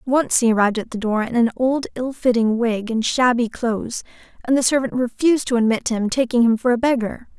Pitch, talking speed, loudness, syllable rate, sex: 240 Hz, 220 wpm, -19 LUFS, 5.7 syllables/s, female